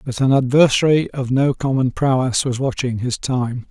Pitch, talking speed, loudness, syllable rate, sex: 130 Hz, 180 wpm, -18 LUFS, 4.7 syllables/s, male